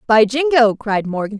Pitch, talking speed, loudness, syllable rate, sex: 230 Hz, 170 wpm, -16 LUFS, 4.6 syllables/s, female